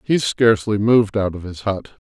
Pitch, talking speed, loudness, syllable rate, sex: 105 Hz, 205 wpm, -18 LUFS, 5.3 syllables/s, male